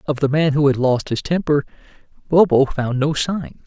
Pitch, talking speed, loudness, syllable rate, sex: 145 Hz, 195 wpm, -18 LUFS, 4.9 syllables/s, male